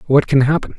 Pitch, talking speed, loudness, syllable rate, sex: 140 Hz, 230 wpm, -15 LUFS, 6.6 syllables/s, male